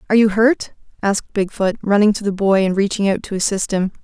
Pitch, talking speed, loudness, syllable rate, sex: 200 Hz, 240 wpm, -17 LUFS, 6.2 syllables/s, female